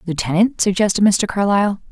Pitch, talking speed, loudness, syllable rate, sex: 200 Hz, 125 wpm, -16 LUFS, 6.2 syllables/s, female